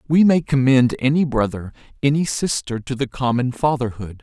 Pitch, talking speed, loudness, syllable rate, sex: 130 Hz, 155 wpm, -19 LUFS, 5.1 syllables/s, male